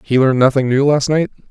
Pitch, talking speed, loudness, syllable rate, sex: 135 Hz, 240 wpm, -14 LUFS, 6.5 syllables/s, male